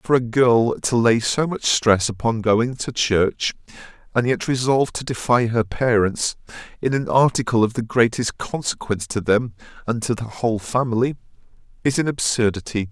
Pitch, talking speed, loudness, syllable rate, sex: 120 Hz, 165 wpm, -20 LUFS, 4.9 syllables/s, male